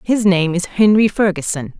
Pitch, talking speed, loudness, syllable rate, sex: 190 Hz, 165 wpm, -15 LUFS, 4.7 syllables/s, female